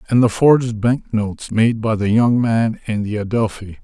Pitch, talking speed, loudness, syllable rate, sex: 110 Hz, 190 wpm, -17 LUFS, 4.8 syllables/s, male